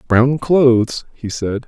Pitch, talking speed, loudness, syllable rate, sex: 125 Hz, 145 wpm, -16 LUFS, 3.5 syllables/s, male